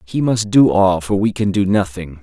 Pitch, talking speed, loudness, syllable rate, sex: 100 Hz, 245 wpm, -16 LUFS, 4.7 syllables/s, male